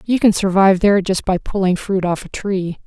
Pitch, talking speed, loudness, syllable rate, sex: 190 Hz, 230 wpm, -17 LUFS, 5.5 syllables/s, female